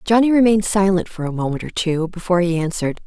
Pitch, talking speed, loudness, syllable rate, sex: 185 Hz, 215 wpm, -18 LUFS, 6.8 syllables/s, female